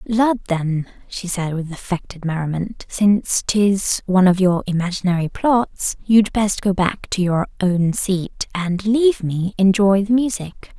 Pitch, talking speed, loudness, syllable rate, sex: 190 Hz, 155 wpm, -19 LUFS, 4.1 syllables/s, female